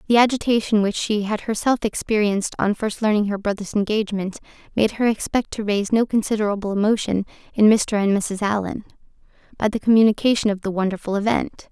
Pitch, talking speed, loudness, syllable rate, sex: 210 Hz, 170 wpm, -21 LUFS, 6.1 syllables/s, female